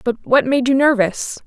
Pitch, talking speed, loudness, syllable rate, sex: 250 Hz, 205 wpm, -16 LUFS, 4.5 syllables/s, female